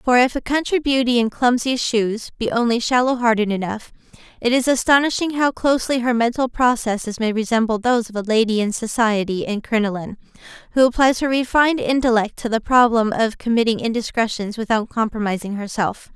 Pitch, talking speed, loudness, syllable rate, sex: 235 Hz, 165 wpm, -19 LUFS, 5.8 syllables/s, female